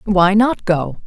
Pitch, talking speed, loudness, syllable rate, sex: 195 Hz, 170 wpm, -15 LUFS, 3.3 syllables/s, female